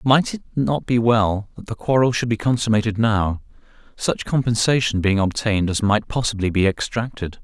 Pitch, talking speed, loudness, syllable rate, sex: 110 Hz, 160 wpm, -20 LUFS, 5.2 syllables/s, male